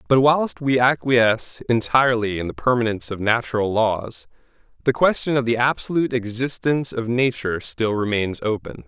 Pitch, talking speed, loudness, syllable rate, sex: 120 Hz, 150 wpm, -20 LUFS, 5.4 syllables/s, male